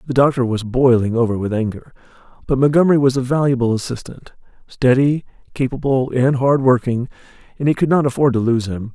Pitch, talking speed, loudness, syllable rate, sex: 130 Hz, 155 wpm, -17 LUFS, 5.9 syllables/s, male